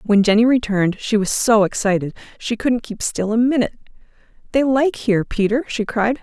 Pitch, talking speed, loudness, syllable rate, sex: 225 Hz, 185 wpm, -18 LUFS, 5.7 syllables/s, female